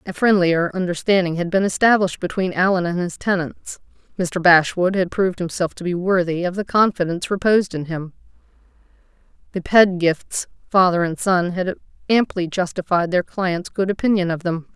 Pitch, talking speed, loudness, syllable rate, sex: 180 Hz, 160 wpm, -19 LUFS, 5.4 syllables/s, female